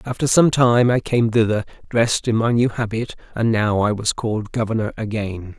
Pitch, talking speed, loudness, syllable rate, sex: 115 Hz, 195 wpm, -19 LUFS, 5.2 syllables/s, male